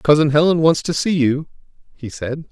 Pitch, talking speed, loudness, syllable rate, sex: 150 Hz, 190 wpm, -17 LUFS, 5.0 syllables/s, male